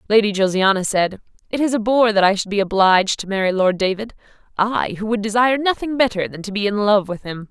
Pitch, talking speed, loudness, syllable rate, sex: 205 Hz, 230 wpm, -18 LUFS, 6.1 syllables/s, female